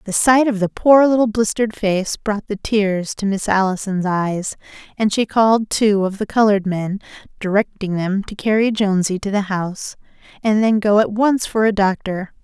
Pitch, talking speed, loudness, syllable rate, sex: 205 Hz, 190 wpm, -18 LUFS, 5.0 syllables/s, female